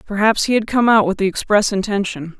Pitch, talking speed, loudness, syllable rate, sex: 205 Hz, 225 wpm, -17 LUFS, 5.8 syllables/s, female